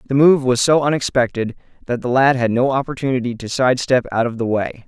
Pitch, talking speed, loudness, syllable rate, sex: 125 Hz, 220 wpm, -17 LUFS, 5.8 syllables/s, male